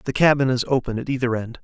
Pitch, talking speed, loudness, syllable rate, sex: 125 Hz, 260 wpm, -21 LUFS, 6.9 syllables/s, male